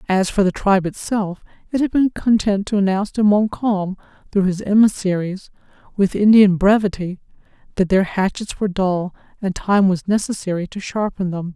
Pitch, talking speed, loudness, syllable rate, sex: 195 Hz, 160 wpm, -18 LUFS, 5.2 syllables/s, female